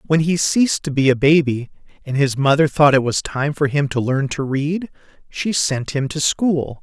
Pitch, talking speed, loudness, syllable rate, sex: 145 Hz, 220 wpm, -18 LUFS, 4.7 syllables/s, male